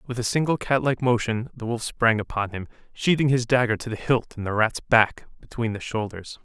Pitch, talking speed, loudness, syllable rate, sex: 115 Hz, 215 wpm, -24 LUFS, 5.4 syllables/s, male